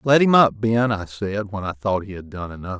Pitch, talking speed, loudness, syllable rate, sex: 105 Hz, 280 wpm, -20 LUFS, 5.2 syllables/s, male